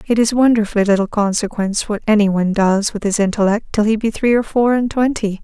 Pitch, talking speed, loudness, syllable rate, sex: 215 Hz, 220 wpm, -16 LUFS, 6.1 syllables/s, female